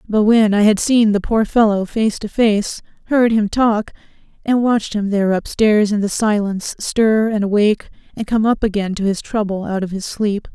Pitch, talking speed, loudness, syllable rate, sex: 210 Hz, 205 wpm, -17 LUFS, 5.0 syllables/s, female